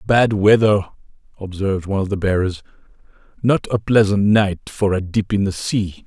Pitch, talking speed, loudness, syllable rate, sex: 100 Hz, 170 wpm, -18 LUFS, 5.2 syllables/s, male